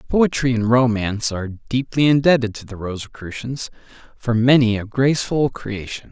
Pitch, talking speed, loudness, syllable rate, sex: 120 Hz, 135 wpm, -19 LUFS, 5.1 syllables/s, male